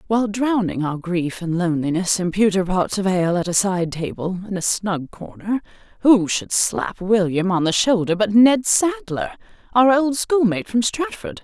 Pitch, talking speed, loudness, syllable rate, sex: 200 Hz, 180 wpm, -19 LUFS, 4.8 syllables/s, female